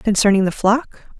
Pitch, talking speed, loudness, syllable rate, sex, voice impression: 215 Hz, 150 wpm, -17 LUFS, 4.8 syllables/s, female, feminine, adult-like, soft, sweet, kind